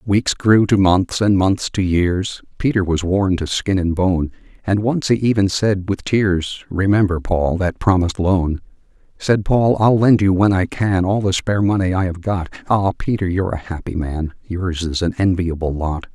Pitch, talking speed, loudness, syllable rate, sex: 95 Hz, 195 wpm, -18 LUFS, 4.6 syllables/s, male